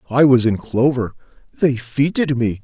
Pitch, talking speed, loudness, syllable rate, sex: 130 Hz, 160 wpm, -17 LUFS, 4.2 syllables/s, male